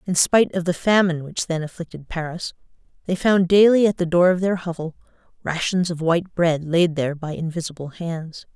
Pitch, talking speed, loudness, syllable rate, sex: 170 Hz, 190 wpm, -21 LUFS, 5.6 syllables/s, female